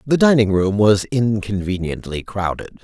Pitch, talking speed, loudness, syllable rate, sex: 105 Hz, 125 wpm, -18 LUFS, 4.4 syllables/s, male